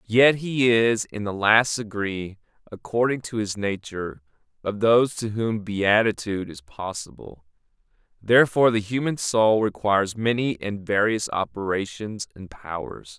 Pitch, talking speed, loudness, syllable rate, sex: 105 Hz, 130 wpm, -23 LUFS, 4.6 syllables/s, male